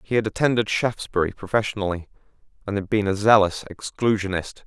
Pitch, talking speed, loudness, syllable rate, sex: 105 Hz, 140 wpm, -22 LUFS, 6.1 syllables/s, male